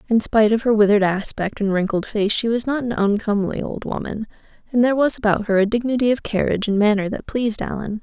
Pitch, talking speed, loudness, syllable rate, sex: 215 Hz, 225 wpm, -20 LUFS, 6.5 syllables/s, female